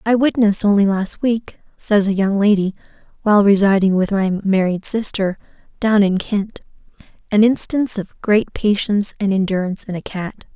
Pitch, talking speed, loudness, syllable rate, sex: 205 Hz, 160 wpm, -17 LUFS, 5.2 syllables/s, female